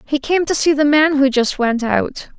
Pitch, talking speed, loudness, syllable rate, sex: 280 Hz, 250 wpm, -16 LUFS, 4.6 syllables/s, female